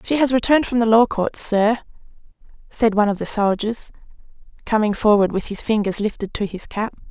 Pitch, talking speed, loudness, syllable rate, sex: 215 Hz, 185 wpm, -19 LUFS, 5.7 syllables/s, female